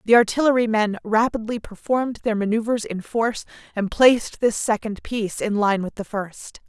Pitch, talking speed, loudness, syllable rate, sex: 220 Hz, 170 wpm, -21 LUFS, 5.2 syllables/s, female